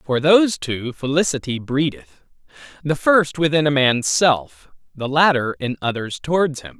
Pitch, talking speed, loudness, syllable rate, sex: 140 Hz, 150 wpm, -19 LUFS, 4.5 syllables/s, male